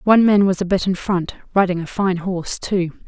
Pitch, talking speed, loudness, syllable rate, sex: 185 Hz, 215 wpm, -19 LUFS, 5.5 syllables/s, female